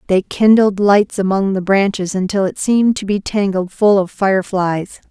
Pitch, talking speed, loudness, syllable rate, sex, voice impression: 195 Hz, 190 wpm, -15 LUFS, 4.6 syllables/s, female, feminine, adult-like, slightly soft, sincere, friendly, slightly kind